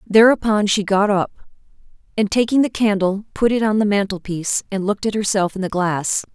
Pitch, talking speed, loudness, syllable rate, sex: 205 Hz, 200 wpm, -18 LUFS, 5.5 syllables/s, female